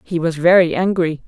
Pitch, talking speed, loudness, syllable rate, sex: 170 Hz, 190 wpm, -16 LUFS, 5.3 syllables/s, female